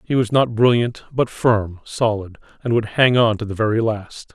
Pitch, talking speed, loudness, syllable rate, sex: 115 Hz, 205 wpm, -19 LUFS, 4.6 syllables/s, male